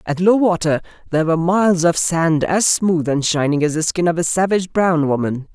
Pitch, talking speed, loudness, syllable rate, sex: 170 Hz, 215 wpm, -17 LUFS, 5.5 syllables/s, male